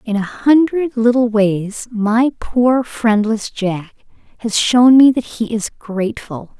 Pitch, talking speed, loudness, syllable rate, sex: 230 Hz, 145 wpm, -15 LUFS, 3.7 syllables/s, female